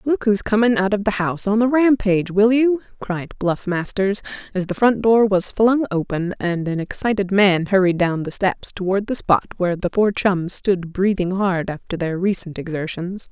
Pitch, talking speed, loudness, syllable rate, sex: 195 Hz, 200 wpm, -19 LUFS, 4.8 syllables/s, female